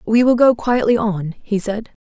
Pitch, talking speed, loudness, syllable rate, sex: 220 Hz, 205 wpm, -17 LUFS, 4.5 syllables/s, female